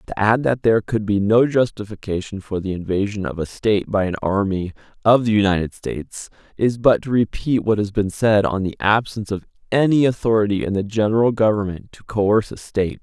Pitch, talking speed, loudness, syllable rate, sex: 105 Hz, 200 wpm, -19 LUFS, 5.7 syllables/s, male